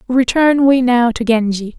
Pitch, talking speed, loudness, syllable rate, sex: 245 Hz, 170 wpm, -13 LUFS, 4.4 syllables/s, female